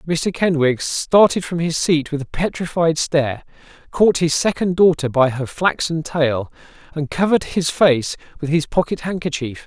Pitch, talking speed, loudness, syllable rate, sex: 160 Hz, 160 wpm, -18 LUFS, 4.6 syllables/s, male